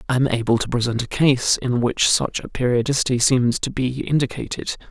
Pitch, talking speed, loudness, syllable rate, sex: 125 Hz, 195 wpm, -20 LUFS, 5.5 syllables/s, male